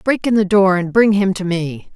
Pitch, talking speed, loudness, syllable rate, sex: 190 Hz, 275 wpm, -15 LUFS, 4.9 syllables/s, female